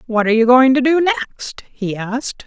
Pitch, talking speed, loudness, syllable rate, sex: 240 Hz, 220 wpm, -15 LUFS, 4.8 syllables/s, female